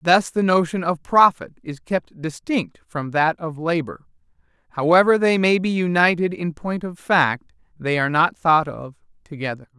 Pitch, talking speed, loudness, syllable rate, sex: 170 Hz, 165 wpm, -20 LUFS, 4.6 syllables/s, male